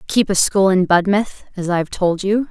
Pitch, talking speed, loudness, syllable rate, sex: 190 Hz, 240 wpm, -17 LUFS, 5.0 syllables/s, female